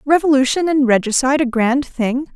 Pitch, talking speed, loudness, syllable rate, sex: 270 Hz, 155 wpm, -16 LUFS, 5.5 syllables/s, female